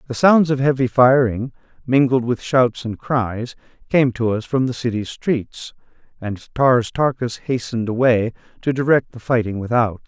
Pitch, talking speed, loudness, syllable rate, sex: 125 Hz, 160 wpm, -19 LUFS, 4.5 syllables/s, male